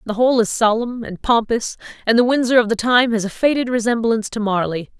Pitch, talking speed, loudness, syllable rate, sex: 230 Hz, 215 wpm, -18 LUFS, 6.0 syllables/s, female